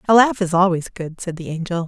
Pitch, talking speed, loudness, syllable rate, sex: 180 Hz, 255 wpm, -19 LUFS, 6.2 syllables/s, female